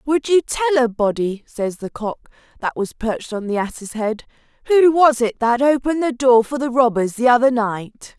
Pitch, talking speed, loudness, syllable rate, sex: 245 Hz, 205 wpm, -18 LUFS, 4.7 syllables/s, female